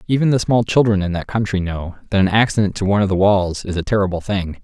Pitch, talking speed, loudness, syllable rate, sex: 100 Hz, 260 wpm, -18 LUFS, 6.5 syllables/s, male